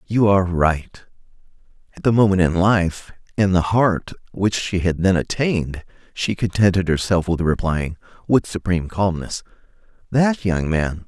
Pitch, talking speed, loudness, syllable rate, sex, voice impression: 95 Hz, 140 wpm, -19 LUFS, 4.5 syllables/s, male, very masculine, adult-like, cool, slightly refreshing, sincere, slightly mature